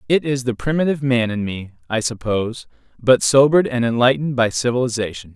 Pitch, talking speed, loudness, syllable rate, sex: 125 Hz, 170 wpm, -18 LUFS, 6.2 syllables/s, male